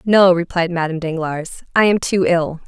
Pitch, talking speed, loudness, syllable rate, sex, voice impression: 175 Hz, 180 wpm, -17 LUFS, 5.2 syllables/s, female, feminine, adult-like, slightly fluent, sincere, slightly calm, slightly sweet